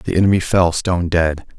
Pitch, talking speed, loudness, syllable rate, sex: 90 Hz, 190 wpm, -17 LUFS, 5.5 syllables/s, male